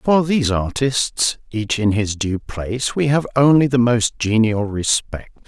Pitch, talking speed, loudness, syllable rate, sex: 120 Hz, 165 wpm, -18 LUFS, 4.1 syllables/s, male